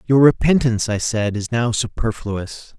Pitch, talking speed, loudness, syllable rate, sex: 115 Hz, 150 wpm, -19 LUFS, 4.6 syllables/s, male